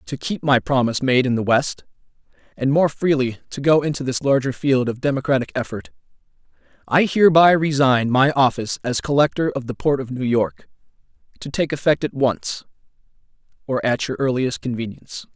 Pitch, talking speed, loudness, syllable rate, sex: 135 Hz, 170 wpm, -19 LUFS, 5.5 syllables/s, male